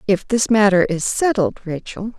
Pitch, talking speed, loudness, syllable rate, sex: 200 Hz, 165 wpm, -18 LUFS, 4.6 syllables/s, female